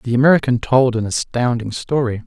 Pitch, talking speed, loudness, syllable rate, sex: 120 Hz, 160 wpm, -17 LUFS, 5.4 syllables/s, male